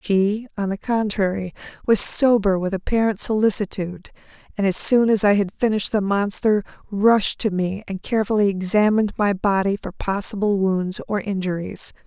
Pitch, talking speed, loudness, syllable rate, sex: 200 Hz, 155 wpm, -20 LUFS, 5.1 syllables/s, female